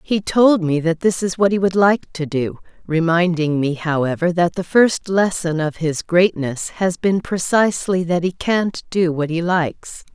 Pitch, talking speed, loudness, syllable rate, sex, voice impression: 175 Hz, 190 wpm, -18 LUFS, 4.4 syllables/s, female, very feminine, very adult-like, thin, very tensed, very powerful, bright, soft, slightly clear, fluent, slightly raspy, cute, very intellectual, refreshing, sincere, very calm, friendly, reassuring, unique, elegant, slightly wild, very sweet, slightly lively, kind, slightly sharp, modest